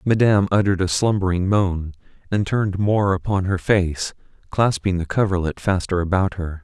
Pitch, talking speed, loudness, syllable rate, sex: 95 Hz, 155 wpm, -20 LUFS, 5.2 syllables/s, male